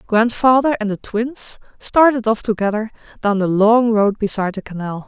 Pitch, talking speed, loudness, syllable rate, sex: 220 Hz, 165 wpm, -17 LUFS, 4.9 syllables/s, female